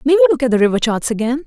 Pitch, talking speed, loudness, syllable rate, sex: 255 Hz, 330 wpm, -15 LUFS, 8.1 syllables/s, female